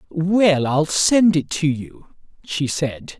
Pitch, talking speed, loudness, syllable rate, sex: 160 Hz, 150 wpm, -19 LUFS, 3.0 syllables/s, male